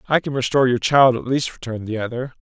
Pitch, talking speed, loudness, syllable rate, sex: 125 Hz, 250 wpm, -19 LUFS, 6.9 syllables/s, male